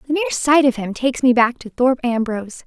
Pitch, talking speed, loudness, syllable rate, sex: 255 Hz, 245 wpm, -18 LUFS, 6.4 syllables/s, female